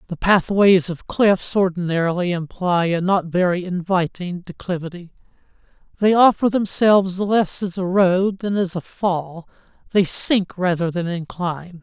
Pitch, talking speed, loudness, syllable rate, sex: 180 Hz, 135 wpm, -19 LUFS, 4.4 syllables/s, male